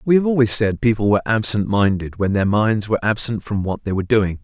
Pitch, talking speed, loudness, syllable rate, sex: 105 Hz, 245 wpm, -18 LUFS, 6.1 syllables/s, male